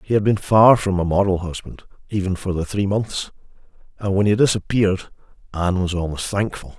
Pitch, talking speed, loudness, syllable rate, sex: 95 Hz, 185 wpm, -20 LUFS, 5.8 syllables/s, male